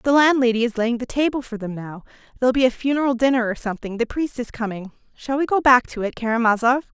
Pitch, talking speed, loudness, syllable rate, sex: 240 Hz, 225 wpm, -20 LUFS, 6.3 syllables/s, female